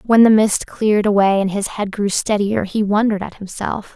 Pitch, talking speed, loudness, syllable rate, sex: 205 Hz, 210 wpm, -17 LUFS, 5.2 syllables/s, female